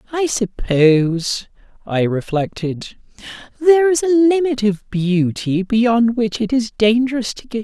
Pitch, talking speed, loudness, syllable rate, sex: 225 Hz, 135 wpm, -17 LUFS, 4.1 syllables/s, male